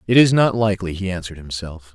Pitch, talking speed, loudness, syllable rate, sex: 95 Hz, 215 wpm, -19 LUFS, 6.7 syllables/s, male